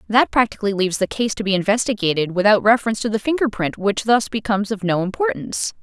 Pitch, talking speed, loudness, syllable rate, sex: 210 Hz, 205 wpm, -19 LUFS, 6.8 syllables/s, female